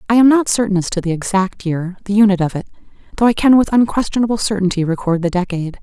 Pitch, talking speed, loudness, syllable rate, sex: 200 Hz, 205 wpm, -16 LUFS, 6.8 syllables/s, female